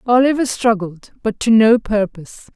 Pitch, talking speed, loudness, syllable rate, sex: 220 Hz, 140 wpm, -16 LUFS, 4.9 syllables/s, female